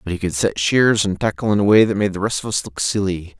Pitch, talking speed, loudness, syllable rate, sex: 100 Hz, 320 wpm, -18 LUFS, 6.1 syllables/s, male